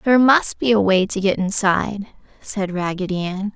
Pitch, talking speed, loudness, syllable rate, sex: 205 Hz, 185 wpm, -19 LUFS, 5.0 syllables/s, female